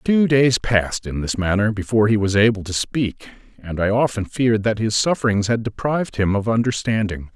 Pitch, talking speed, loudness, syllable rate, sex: 110 Hz, 195 wpm, -19 LUFS, 5.5 syllables/s, male